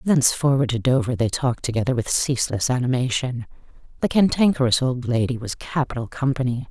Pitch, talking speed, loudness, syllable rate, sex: 125 Hz, 145 wpm, -21 LUFS, 5.9 syllables/s, female